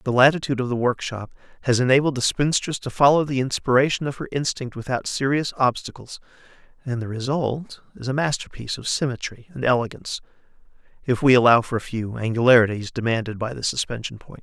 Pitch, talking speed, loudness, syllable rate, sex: 125 Hz, 170 wpm, -22 LUFS, 6.1 syllables/s, male